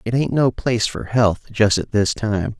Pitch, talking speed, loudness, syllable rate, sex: 110 Hz, 230 wpm, -19 LUFS, 4.5 syllables/s, male